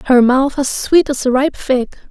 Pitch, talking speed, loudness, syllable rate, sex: 265 Hz, 230 wpm, -14 LUFS, 4.6 syllables/s, female